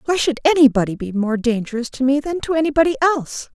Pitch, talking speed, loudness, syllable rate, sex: 270 Hz, 200 wpm, -18 LUFS, 6.4 syllables/s, female